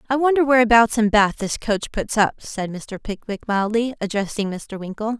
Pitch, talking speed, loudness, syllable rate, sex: 220 Hz, 185 wpm, -20 LUFS, 5.1 syllables/s, female